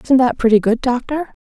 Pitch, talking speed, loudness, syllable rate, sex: 250 Hz, 210 wpm, -16 LUFS, 5.5 syllables/s, female